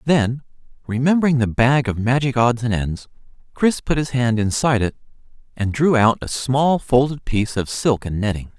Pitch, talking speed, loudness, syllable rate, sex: 125 Hz, 180 wpm, -19 LUFS, 5.1 syllables/s, male